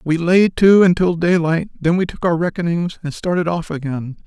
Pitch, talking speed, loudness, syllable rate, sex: 170 Hz, 195 wpm, -17 LUFS, 5.0 syllables/s, male